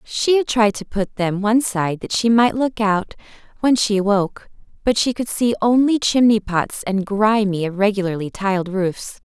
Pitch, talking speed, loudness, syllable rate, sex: 210 Hz, 180 wpm, -18 LUFS, 4.8 syllables/s, female